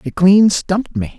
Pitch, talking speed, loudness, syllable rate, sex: 175 Hz, 200 wpm, -14 LUFS, 4.7 syllables/s, male